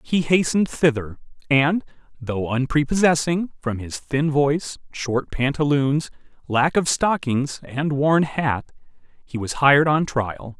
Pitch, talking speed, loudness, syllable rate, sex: 145 Hz, 130 wpm, -21 LUFS, 4.1 syllables/s, male